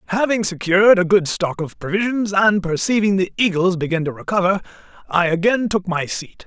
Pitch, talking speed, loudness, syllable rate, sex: 185 Hz, 175 wpm, -18 LUFS, 5.5 syllables/s, male